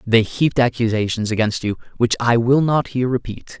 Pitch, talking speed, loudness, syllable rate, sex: 120 Hz, 185 wpm, -18 LUFS, 5.5 syllables/s, male